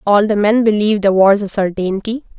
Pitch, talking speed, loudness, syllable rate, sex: 205 Hz, 200 wpm, -14 LUFS, 5.6 syllables/s, female